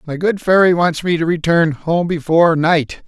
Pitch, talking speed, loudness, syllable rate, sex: 165 Hz, 195 wpm, -15 LUFS, 4.8 syllables/s, male